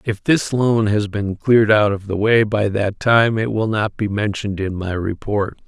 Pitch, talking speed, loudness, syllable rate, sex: 105 Hz, 220 wpm, -18 LUFS, 4.5 syllables/s, male